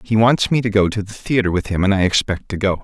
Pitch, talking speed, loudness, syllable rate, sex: 100 Hz, 315 wpm, -18 LUFS, 6.2 syllables/s, male